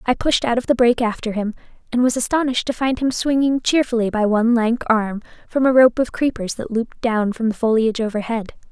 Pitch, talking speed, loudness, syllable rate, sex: 235 Hz, 220 wpm, -19 LUFS, 6.0 syllables/s, female